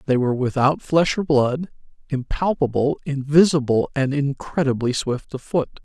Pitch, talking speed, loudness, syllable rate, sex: 140 Hz, 135 wpm, -21 LUFS, 4.8 syllables/s, male